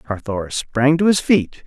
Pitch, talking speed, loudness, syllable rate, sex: 135 Hz, 180 wpm, -18 LUFS, 4.6 syllables/s, male